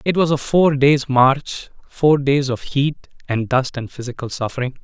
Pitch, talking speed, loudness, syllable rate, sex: 135 Hz, 175 wpm, -18 LUFS, 4.4 syllables/s, male